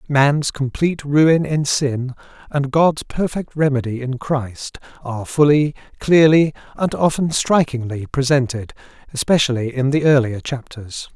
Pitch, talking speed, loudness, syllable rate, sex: 140 Hz, 125 wpm, -18 LUFS, 4.3 syllables/s, male